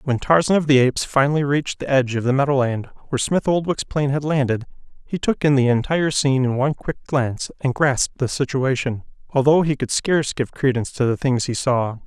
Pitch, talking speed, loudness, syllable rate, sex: 135 Hz, 215 wpm, -20 LUFS, 6.0 syllables/s, male